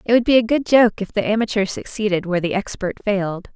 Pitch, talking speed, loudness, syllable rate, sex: 205 Hz, 235 wpm, -19 LUFS, 6.3 syllables/s, female